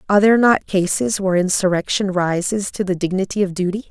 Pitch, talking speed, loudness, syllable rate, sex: 190 Hz, 185 wpm, -18 LUFS, 6.2 syllables/s, female